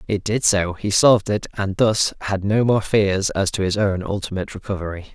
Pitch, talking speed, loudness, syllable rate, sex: 100 Hz, 210 wpm, -20 LUFS, 5.2 syllables/s, male